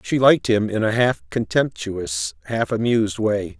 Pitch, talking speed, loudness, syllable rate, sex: 115 Hz, 165 wpm, -20 LUFS, 4.6 syllables/s, male